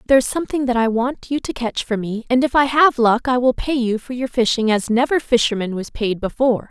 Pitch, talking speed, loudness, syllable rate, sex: 245 Hz, 260 wpm, -18 LUFS, 5.8 syllables/s, female